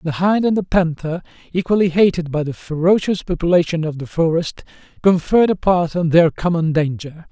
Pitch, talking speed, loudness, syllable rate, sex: 170 Hz, 165 wpm, -17 LUFS, 5.4 syllables/s, male